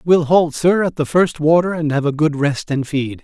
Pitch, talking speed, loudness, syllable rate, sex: 155 Hz, 260 wpm, -16 LUFS, 4.8 syllables/s, male